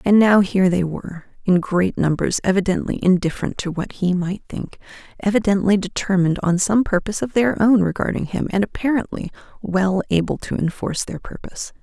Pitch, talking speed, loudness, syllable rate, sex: 190 Hz, 165 wpm, -20 LUFS, 5.6 syllables/s, female